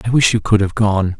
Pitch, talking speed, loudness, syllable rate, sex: 105 Hz, 300 wpm, -15 LUFS, 5.7 syllables/s, male